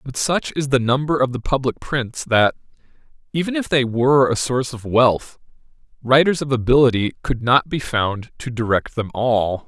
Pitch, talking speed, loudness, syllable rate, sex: 125 Hz, 180 wpm, -19 LUFS, 4.9 syllables/s, male